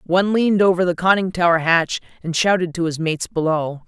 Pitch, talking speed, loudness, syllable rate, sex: 175 Hz, 200 wpm, -18 LUFS, 5.9 syllables/s, female